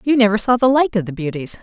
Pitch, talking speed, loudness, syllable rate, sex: 215 Hz, 295 wpm, -17 LUFS, 6.7 syllables/s, female